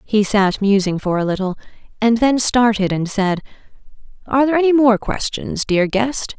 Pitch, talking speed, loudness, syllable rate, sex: 220 Hz, 170 wpm, -17 LUFS, 5.0 syllables/s, female